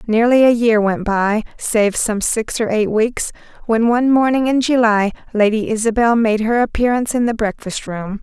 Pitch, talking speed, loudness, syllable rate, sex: 225 Hz, 180 wpm, -16 LUFS, 4.9 syllables/s, female